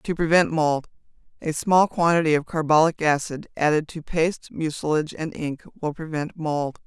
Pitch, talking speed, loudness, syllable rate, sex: 155 Hz, 150 wpm, -23 LUFS, 4.9 syllables/s, female